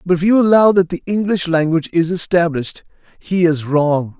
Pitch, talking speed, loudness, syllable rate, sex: 170 Hz, 185 wpm, -15 LUFS, 5.5 syllables/s, male